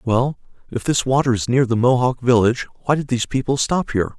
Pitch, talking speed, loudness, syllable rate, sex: 125 Hz, 215 wpm, -19 LUFS, 6.2 syllables/s, male